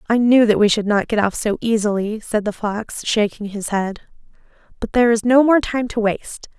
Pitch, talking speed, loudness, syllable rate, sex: 220 Hz, 220 wpm, -18 LUFS, 5.3 syllables/s, female